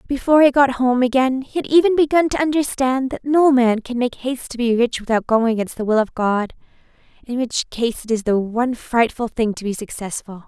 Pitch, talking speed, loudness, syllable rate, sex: 245 Hz, 225 wpm, -18 LUFS, 5.5 syllables/s, female